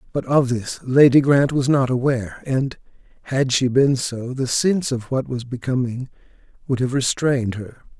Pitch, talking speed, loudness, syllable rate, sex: 130 Hz, 175 wpm, -20 LUFS, 4.8 syllables/s, male